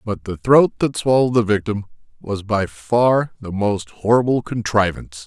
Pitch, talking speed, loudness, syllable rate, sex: 110 Hz, 160 wpm, -19 LUFS, 4.7 syllables/s, male